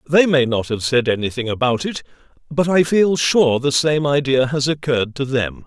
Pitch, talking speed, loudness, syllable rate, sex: 135 Hz, 200 wpm, -18 LUFS, 4.9 syllables/s, male